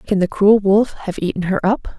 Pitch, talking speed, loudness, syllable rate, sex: 200 Hz, 240 wpm, -17 LUFS, 4.8 syllables/s, female